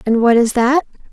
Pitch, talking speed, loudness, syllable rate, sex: 245 Hz, 215 wpm, -14 LUFS, 5.2 syllables/s, female